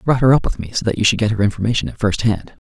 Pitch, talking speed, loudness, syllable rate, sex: 110 Hz, 360 wpm, -18 LUFS, 7.5 syllables/s, male